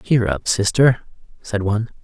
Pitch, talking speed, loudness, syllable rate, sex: 110 Hz, 150 wpm, -19 LUFS, 4.7 syllables/s, male